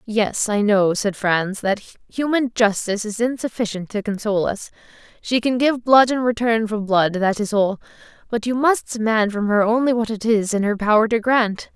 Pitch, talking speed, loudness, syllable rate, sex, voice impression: 220 Hz, 200 wpm, -19 LUFS, 4.9 syllables/s, female, feminine, adult-like, tensed, bright, clear, slightly halting, intellectual, calm, friendly, slightly reassuring, lively, kind